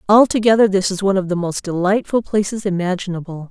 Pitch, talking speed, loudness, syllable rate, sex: 195 Hz, 170 wpm, -17 LUFS, 6.3 syllables/s, female